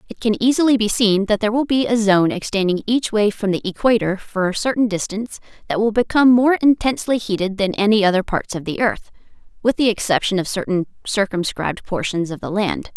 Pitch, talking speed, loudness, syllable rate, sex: 210 Hz, 205 wpm, -18 LUFS, 5.9 syllables/s, female